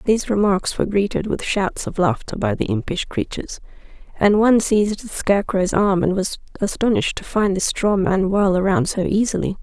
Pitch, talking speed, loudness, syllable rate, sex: 200 Hz, 185 wpm, -19 LUFS, 5.5 syllables/s, female